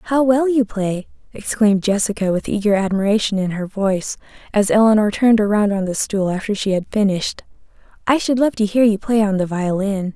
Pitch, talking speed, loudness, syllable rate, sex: 210 Hz, 195 wpm, -18 LUFS, 5.7 syllables/s, female